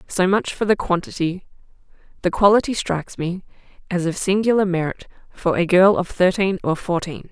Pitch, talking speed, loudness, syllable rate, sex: 185 Hz, 165 wpm, -20 LUFS, 5.3 syllables/s, female